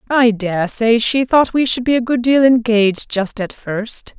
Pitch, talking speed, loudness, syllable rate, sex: 235 Hz, 215 wpm, -15 LUFS, 4.3 syllables/s, female